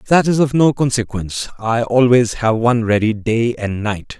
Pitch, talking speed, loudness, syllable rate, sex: 115 Hz, 185 wpm, -16 LUFS, 4.7 syllables/s, male